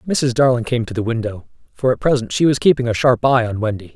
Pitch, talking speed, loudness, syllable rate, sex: 120 Hz, 260 wpm, -17 LUFS, 6.2 syllables/s, male